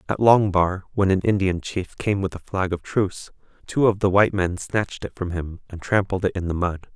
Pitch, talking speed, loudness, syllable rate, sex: 95 Hz, 240 wpm, -22 LUFS, 5.4 syllables/s, male